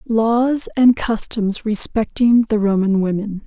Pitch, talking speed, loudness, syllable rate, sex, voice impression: 220 Hz, 120 wpm, -17 LUFS, 3.7 syllables/s, female, very feminine, slightly young, adult-like, thin, slightly relaxed, slightly weak, slightly dark, very soft, slightly clear, fluent, slightly raspy, very cute, intellectual, very refreshing, sincere, very calm, friendly, very reassuring, unique, very elegant, very sweet, slightly lively, very kind, modest, slightly light